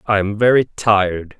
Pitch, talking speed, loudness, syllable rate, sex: 105 Hz, 170 wpm, -16 LUFS, 4.8 syllables/s, male